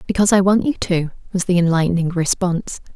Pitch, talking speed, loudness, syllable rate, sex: 180 Hz, 180 wpm, -18 LUFS, 6.5 syllables/s, female